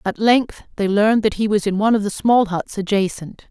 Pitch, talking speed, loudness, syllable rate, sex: 205 Hz, 240 wpm, -18 LUFS, 5.6 syllables/s, female